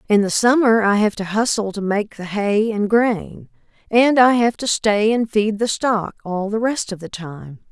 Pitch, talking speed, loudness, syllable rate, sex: 210 Hz, 220 wpm, -18 LUFS, 4.3 syllables/s, female